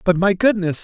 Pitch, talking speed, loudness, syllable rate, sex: 185 Hz, 215 wpm, -17 LUFS, 5.1 syllables/s, male